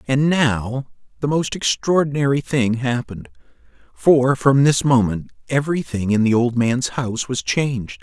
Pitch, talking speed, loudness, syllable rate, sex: 130 Hz, 140 wpm, -19 LUFS, 4.6 syllables/s, male